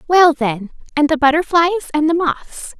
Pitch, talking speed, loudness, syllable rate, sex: 310 Hz, 170 wpm, -16 LUFS, 4.8 syllables/s, female